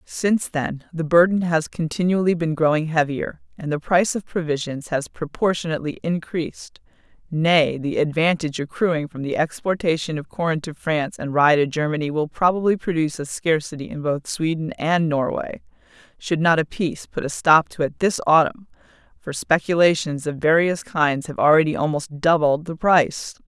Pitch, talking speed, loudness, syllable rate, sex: 160 Hz, 160 wpm, -21 LUFS, 5.2 syllables/s, female